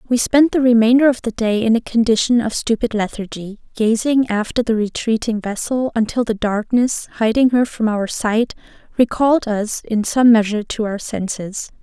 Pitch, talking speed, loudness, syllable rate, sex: 230 Hz, 175 wpm, -17 LUFS, 5.0 syllables/s, female